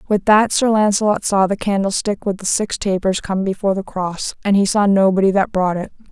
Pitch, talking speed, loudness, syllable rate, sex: 200 Hz, 215 wpm, -17 LUFS, 5.5 syllables/s, female